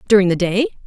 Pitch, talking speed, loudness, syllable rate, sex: 200 Hz, 205 wpm, -17 LUFS, 7.6 syllables/s, female